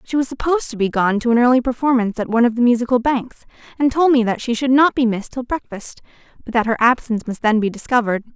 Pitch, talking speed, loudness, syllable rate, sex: 240 Hz, 250 wpm, -18 LUFS, 6.9 syllables/s, female